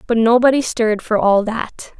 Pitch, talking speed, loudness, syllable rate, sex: 235 Hz, 180 wpm, -16 LUFS, 5.0 syllables/s, female